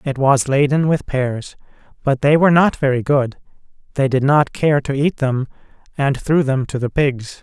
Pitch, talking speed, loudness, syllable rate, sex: 140 Hz, 195 wpm, -17 LUFS, 4.7 syllables/s, male